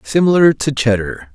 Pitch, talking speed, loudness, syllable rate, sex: 125 Hz, 135 wpm, -14 LUFS, 4.8 syllables/s, male